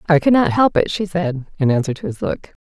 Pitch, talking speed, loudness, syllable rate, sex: 225 Hz, 275 wpm, -18 LUFS, 5.7 syllables/s, female